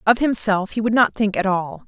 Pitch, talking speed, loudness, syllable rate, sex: 210 Hz, 255 wpm, -19 LUFS, 5.2 syllables/s, female